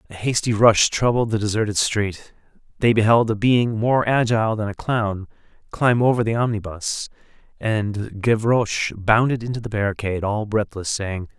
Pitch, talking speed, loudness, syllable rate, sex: 110 Hz, 155 wpm, -20 LUFS, 4.9 syllables/s, male